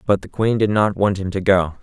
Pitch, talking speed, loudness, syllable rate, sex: 100 Hz, 295 wpm, -18 LUFS, 5.3 syllables/s, male